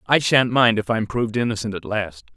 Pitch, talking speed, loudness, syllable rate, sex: 110 Hz, 230 wpm, -20 LUFS, 5.6 syllables/s, male